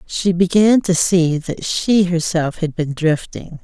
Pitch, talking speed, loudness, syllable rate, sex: 175 Hz, 165 wpm, -17 LUFS, 3.7 syllables/s, female